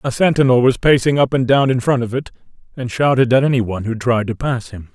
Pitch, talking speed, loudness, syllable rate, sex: 125 Hz, 255 wpm, -16 LUFS, 6.2 syllables/s, male